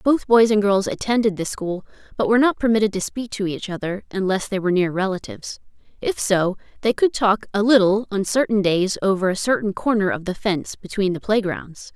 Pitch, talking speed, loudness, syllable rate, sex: 205 Hz, 205 wpm, -20 LUFS, 5.7 syllables/s, female